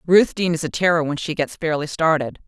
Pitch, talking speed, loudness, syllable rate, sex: 160 Hz, 240 wpm, -20 LUFS, 6.2 syllables/s, female